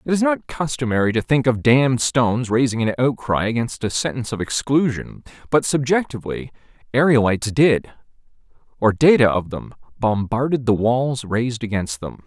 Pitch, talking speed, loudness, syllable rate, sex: 120 Hz, 145 wpm, -19 LUFS, 5.3 syllables/s, male